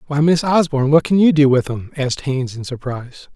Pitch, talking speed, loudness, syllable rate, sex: 140 Hz, 235 wpm, -17 LUFS, 6.7 syllables/s, male